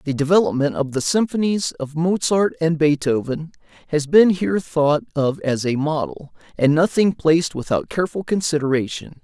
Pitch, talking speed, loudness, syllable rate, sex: 160 Hz, 150 wpm, -19 LUFS, 5.0 syllables/s, male